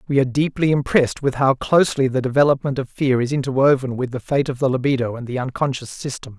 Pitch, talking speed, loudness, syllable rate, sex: 130 Hz, 215 wpm, -19 LUFS, 6.4 syllables/s, male